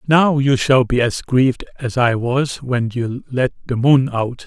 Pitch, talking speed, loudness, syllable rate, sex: 130 Hz, 200 wpm, -17 LUFS, 4.1 syllables/s, male